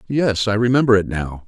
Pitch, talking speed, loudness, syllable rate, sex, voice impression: 110 Hz, 205 wpm, -18 LUFS, 5.3 syllables/s, male, masculine, middle-aged, tensed, powerful, slightly hard, muffled, intellectual, calm, slightly mature, reassuring, wild, slightly lively, slightly strict